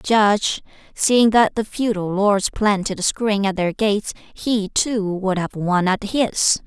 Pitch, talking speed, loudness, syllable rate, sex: 205 Hz, 160 wpm, -19 LUFS, 3.9 syllables/s, female